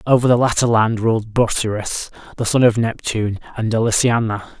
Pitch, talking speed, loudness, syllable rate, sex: 115 Hz, 155 wpm, -18 LUFS, 5.4 syllables/s, male